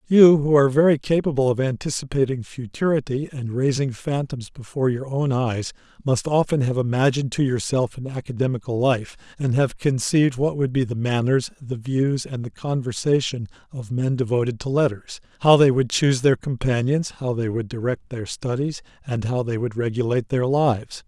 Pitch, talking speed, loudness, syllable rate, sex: 130 Hz, 175 wpm, -22 LUFS, 5.3 syllables/s, male